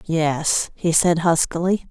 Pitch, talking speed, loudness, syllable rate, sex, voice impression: 165 Hz, 125 wpm, -19 LUFS, 3.4 syllables/s, female, feminine, adult-like, slightly powerful, bright, fluent, intellectual, unique, lively, slightly strict, slightly sharp